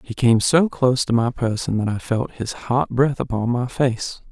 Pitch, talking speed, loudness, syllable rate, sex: 125 Hz, 225 wpm, -20 LUFS, 4.6 syllables/s, male